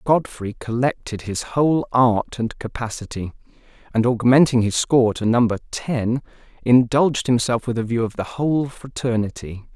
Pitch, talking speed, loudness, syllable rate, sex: 120 Hz, 140 wpm, -20 LUFS, 4.9 syllables/s, male